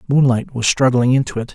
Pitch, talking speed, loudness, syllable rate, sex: 125 Hz, 195 wpm, -16 LUFS, 5.8 syllables/s, male